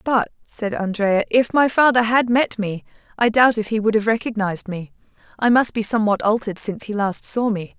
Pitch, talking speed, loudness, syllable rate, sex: 220 Hz, 210 wpm, -19 LUFS, 5.5 syllables/s, female